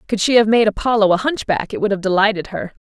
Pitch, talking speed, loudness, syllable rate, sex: 205 Hz, 255 wpm, -17 LUFS, 6.5 syllables/s, female